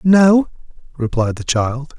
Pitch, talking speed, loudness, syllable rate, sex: 145 Hz, 120 wpm, -16 LUFS, 3.5 syllables/s, male